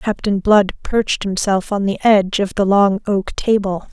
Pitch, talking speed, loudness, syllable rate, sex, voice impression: 200 Hz, 185 wpm, -16 LUFS, 4.6 syllables/s, female, feminine, adult-like, slightly soft, slightly intellectual, slightly sweet, slightly strict